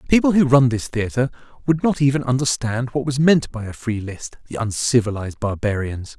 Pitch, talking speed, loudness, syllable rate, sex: 125 Hz, 205 wpm, -20 LUFS, 5.7 syllables/s, male